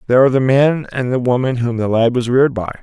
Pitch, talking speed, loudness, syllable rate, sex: 125 Hz, 275 wpm, -15 LUFS, 6.9 syllables/s, male